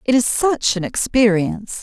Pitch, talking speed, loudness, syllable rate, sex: 230 Hz, 165 wpm, -17 LUFS, 4.6 syllables/s, female